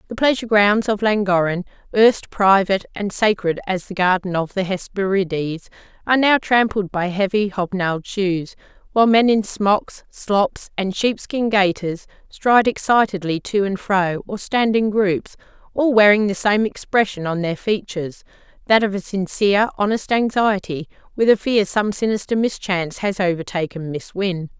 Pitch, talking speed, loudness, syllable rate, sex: 200 Hz, 150 wpm, -19 LUFS, 4.8 syllables/s, female